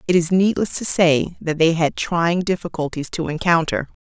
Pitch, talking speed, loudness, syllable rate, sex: 170 Hz, 180 wpm, -19 LUFS, 4.8 syllables/s, female